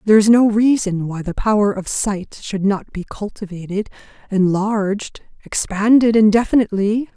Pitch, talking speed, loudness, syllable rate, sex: 205 Hz, 135 wpm, -17 LUFS, 5.0 syllables/s, female